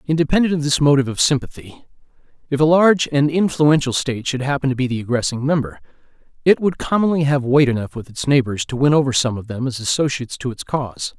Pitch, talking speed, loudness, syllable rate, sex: 135 Hz, 210 wpm, -18 LUFS, 6.5 syllables/s, male